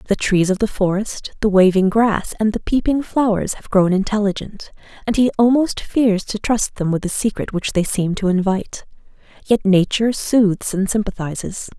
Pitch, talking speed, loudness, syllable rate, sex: 205 Hz, 180 wpm, -18 LUFS, 5.0 syllables/s, female